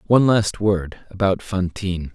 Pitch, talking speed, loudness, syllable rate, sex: 95 Hz, 140 wpm, -20 LUFS, 4.6 syllables/s, male